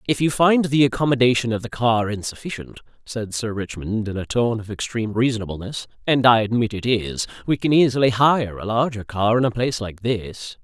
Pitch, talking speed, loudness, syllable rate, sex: 115 Hz, 195 wpm, -21 LUFS, 5.5 syllables/s, male